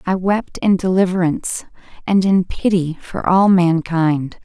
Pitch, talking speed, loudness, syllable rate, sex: 180 Hz, 135 wpm, -17 LUFS, 4.1 syllables/s, female